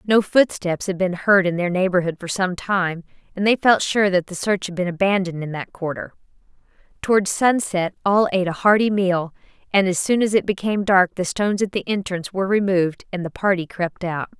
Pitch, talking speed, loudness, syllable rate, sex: 190 Hz, 210 wpm, -20 LUFS, 5.7 syllables/s, female